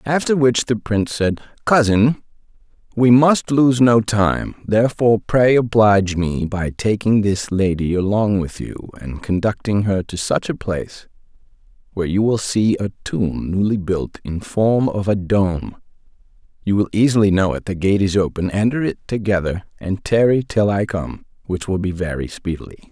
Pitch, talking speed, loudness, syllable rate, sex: 105 Hz, 170 wpm, -18 LUFS, 4.6 syllables/s, male